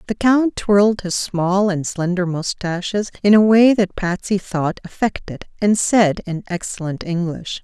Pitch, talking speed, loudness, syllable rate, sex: 190 Hz, 155 wpm, -18 LUFS, 4.2 syllables/s, female